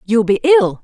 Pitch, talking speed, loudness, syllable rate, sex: 240 Hz, 215 wpm, -13 LUFS, 6.1 syllables/s, female